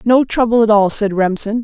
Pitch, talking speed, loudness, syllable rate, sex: 220 Hz, 220 wpm, -14 LUFS, 5.2 syllables/s, female